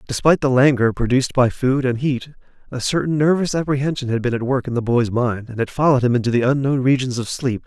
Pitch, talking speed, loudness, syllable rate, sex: 130 Hz, 235 wpm, -19 LUFS, 6.3 syllables/s, male